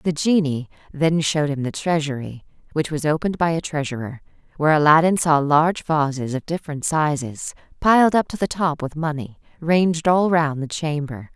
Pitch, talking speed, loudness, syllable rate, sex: 155 Hz, 175 wpm, -20 LUFS, 5.3 syllables/s, female